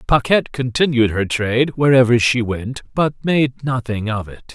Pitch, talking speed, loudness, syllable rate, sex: 125 Hz, 160 wpm, -17 LUFS, 4.6 syllables/s, male